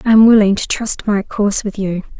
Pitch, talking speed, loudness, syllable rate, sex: 205 Hz, 245 wpm, -14 LUFS, 5.6 syllables/s, female